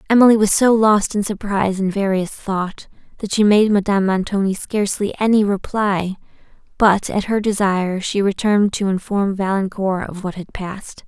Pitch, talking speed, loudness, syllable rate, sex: 200 Hz, 160 wpm, -18 LUFS, 5.2 syllables/s, female